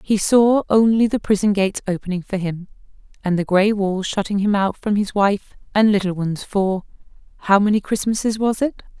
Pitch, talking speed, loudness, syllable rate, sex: 200 Hz, 180 wpm, -19 LUFS, 5.2 syllables/s, female